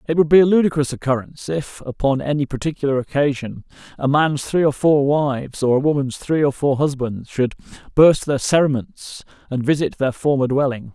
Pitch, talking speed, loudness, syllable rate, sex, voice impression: 140 Hz, 180 wpm, -19 LUFS, 5.4 syllables/s, male, masculine, adult-like, tensed, powerful, clear, fluent, slightly raspy, intellectual, slightly friendly, unique, wild, lively, slightly intense